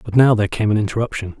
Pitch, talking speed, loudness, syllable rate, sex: 110 Hz, 255 wpm, -18 LUFS, 7.8 syllables/s, male